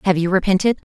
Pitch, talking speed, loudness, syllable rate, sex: 190 Hz, 200 wpm, -17 LUFS, 7.3 syllables/s, female